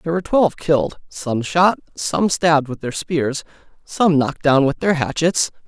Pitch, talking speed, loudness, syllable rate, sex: 155 Hz, 180 wpm, -18 LUFS, 4.9 syllables/s, male